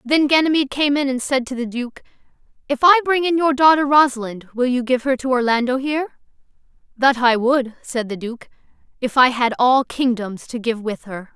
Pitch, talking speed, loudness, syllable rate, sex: 260 Hz, 200 wpm, -18 LUFS, 5.3 syllables/s, female